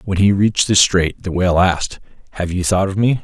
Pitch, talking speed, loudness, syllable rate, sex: 95 Hz, 240 wpm, -16 LUFS, 5.9 syllables/s, male